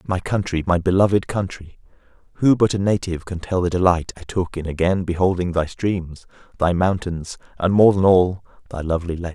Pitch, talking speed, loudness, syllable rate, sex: 90 Hz, 185 wpm, -20 LUFS, 5.4 syllables/s, male